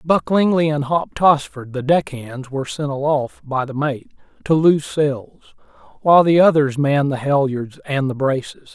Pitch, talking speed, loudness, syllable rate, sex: 140 Hz, 180 wpm, -18 LUFS, 4.7 syllables/s, male